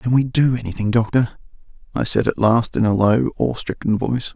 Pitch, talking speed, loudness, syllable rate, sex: 115 Hz, 205 wpm, -19 LUFS, 5.5 syllables/s, male